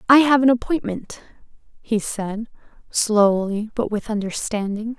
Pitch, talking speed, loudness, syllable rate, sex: 220 Hz, 120 wpm, -21 LUFS, 4.3 syllables/s, female